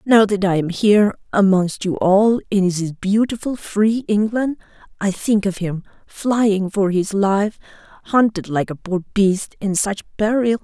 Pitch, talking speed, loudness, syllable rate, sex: 200 Hz, 145 wpm, -18 LUFS, 4.1 syllables/s, female